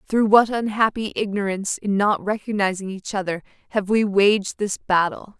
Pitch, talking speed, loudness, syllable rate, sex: 205 Hz, 155 wpm, -21 LUFS, 4.8 syllables/s, female